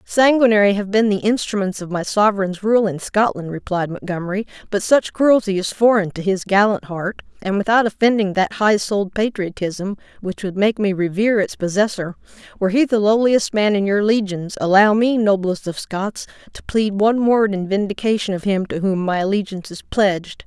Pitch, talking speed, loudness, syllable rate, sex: 200 Hz, 185 wpm, -18 LUFS, 5.3 syllables/s, female